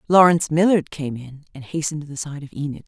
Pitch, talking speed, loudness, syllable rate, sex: 150 Hz, 230 wpm, -21 LUFS, 6.7 syllables/s, female